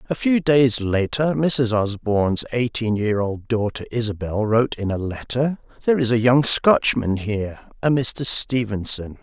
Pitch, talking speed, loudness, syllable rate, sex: 120 Hz, 155 wpm, -20 LUFS, 4.5 syllables/s, male